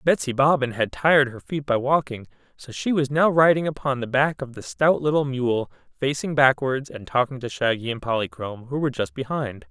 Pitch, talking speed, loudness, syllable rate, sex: 135 Hz, 205 wpm, -22 LUFS, 5.4 syllables/s, male